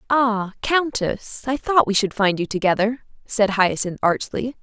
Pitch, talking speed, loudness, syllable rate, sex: 220 Hz, 155 wpm, -20 LUFS, 4.2 syllables/s, female